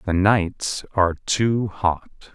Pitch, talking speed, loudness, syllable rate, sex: 100 Hz, 130 wpm, -21 LUFS, 2.8 syllables/s, male